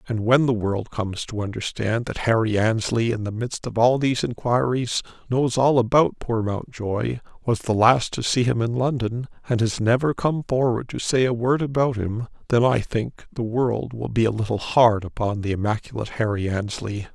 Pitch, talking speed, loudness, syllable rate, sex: 115 Hz, 190 wpm, -22 LUFS, 5.1 syllables/s, male